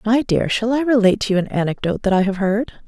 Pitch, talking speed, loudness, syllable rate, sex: 215 Hz, 270 wpm, -18 LUFS, 6.9 syllables/s, female